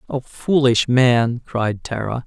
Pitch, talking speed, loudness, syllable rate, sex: 120 Hz, 135 wpm, -18 LUFS, 3.4 syllables/s, male